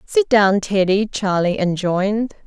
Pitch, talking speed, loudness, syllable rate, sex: 200 Hz, 120 wpm, -18 LUFS, 4.1 syllables/s, female